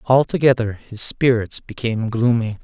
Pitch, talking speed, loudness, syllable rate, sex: 120 Hz, 115 wpm, -19 LUFS, 4.8 syllables/s, male